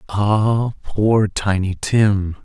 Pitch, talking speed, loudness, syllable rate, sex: 105 Hz, 100 wpm, -18 LUFS, 2.4 syllables/s, male